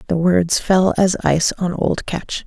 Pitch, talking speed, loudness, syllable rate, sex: 180 Hz, 195 wpm, -17 LUFS, 4.1 syllables/s, female